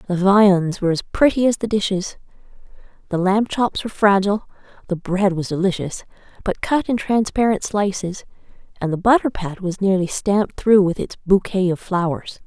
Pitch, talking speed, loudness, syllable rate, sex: 195 Hz, 170 wpm, -19 LUFS, 5.1 syllables/s, female